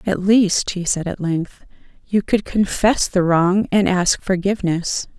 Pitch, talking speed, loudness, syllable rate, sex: 190 Hz, 160 wpm, -18 LUFS, 3.9 syllables/s, female